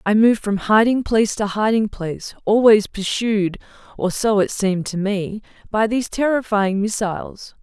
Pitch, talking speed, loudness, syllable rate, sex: 210 Hz, 155 wpm, -19 LUFS, 4.9 syllables/s, female